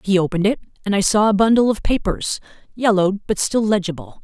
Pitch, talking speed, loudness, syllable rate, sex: 200 Hz, 200 wpm, -18 LUFS, 6.3 syllables/s, female